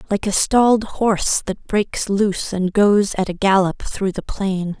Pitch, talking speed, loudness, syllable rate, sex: 200 Hz, 190 wpm, -18 LUFS, 4.2 syllables/s, female